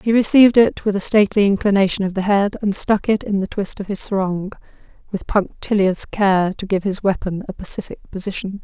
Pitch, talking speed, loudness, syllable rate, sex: 200 Hz, 200 wpm, -18 LUFS, 5.5 syllables/s, female